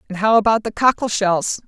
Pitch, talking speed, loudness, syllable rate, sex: 210 Hz, 215 wpm, -17 LUFS, 5.4 syllables/s, female